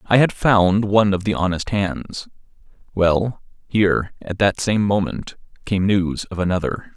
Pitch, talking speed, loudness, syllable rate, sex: 100 Hz, 145 wpm, -19 LUFS, 4.3 syllables/s, male